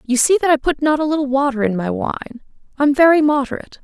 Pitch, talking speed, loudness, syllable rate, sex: 275 Hz, 235 wpm, -16 LUFS, 6.9 syllables/s, female